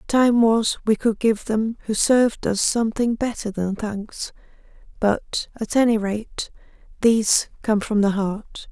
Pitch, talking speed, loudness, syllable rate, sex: 220 Hz, 150 wpm, -21 LUFS, 4.0 syllables/s, female